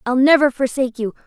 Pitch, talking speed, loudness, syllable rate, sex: 260 Hz, 190 wpm, -17 LUFS, 6.7 syllables/s, female